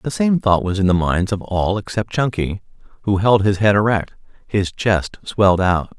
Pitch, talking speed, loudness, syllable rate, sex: 100 Hz, 200 wpm, -18 LUFS, 4.7 syllables/s, male